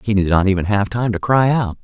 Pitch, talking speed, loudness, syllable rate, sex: 105 Hz, 295 wpm, -17 LUFS, 5.9 syllables/s, male